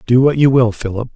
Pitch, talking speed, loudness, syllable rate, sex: 125 Hz, 260 wpm, -14 LUFS, 5.9 syllables/s, male